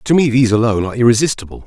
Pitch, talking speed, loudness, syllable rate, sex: 120 Hz, 215 wpm, -14 LUFS, 8.9 syllables/s, male